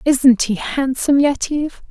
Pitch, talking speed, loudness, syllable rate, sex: 270 Hz, 125 wpm, -16 LUFS, 4.6 syllables/s, female